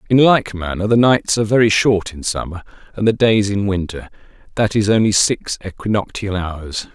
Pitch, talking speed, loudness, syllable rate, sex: 100 Hz, 180 wpm, -17 LUFS, 5.2 syllables/s, male